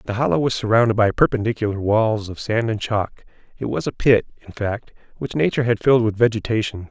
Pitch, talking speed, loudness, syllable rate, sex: 110 Hz, 200 wpm, -20 LUFS, 6.0 syllables/s, male